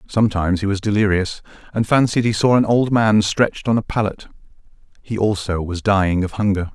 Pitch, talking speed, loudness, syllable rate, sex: 105 Hz, 185 wpm, -18 LUFS, 5.8 syllables/s, male